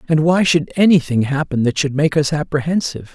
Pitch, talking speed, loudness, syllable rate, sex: 150 Hz, 190 wpm, -16 LUFS, 5.9 syllables/s, male